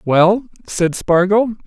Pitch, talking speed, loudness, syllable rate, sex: 195 Hz, 110 wpm, -15 LUFS, 3.5 syllables/s, male